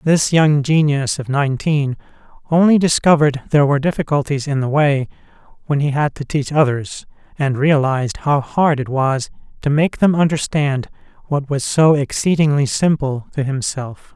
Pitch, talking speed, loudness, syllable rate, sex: 145 Hz, 155 wpm, -17 LUFS, 4.9 syllables/s, male